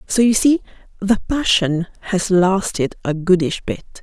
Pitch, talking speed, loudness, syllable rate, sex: 195 Hz, 150 wpm, -18 LUFS, 4.5 syllables/s, female